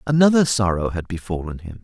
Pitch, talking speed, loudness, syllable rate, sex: 110 Hz, 165 wpm, -20 LUFS, 5.9 syllables/s, male